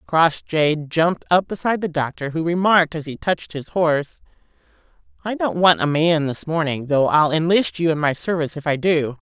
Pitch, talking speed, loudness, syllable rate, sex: 160 Hz, 195 wpm, -19 LUFS, 5.5 syllables/s, female